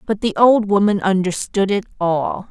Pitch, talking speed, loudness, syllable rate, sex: 200 Hz, 165 wpm, -17 LUFS, 4.6 syllables/s, female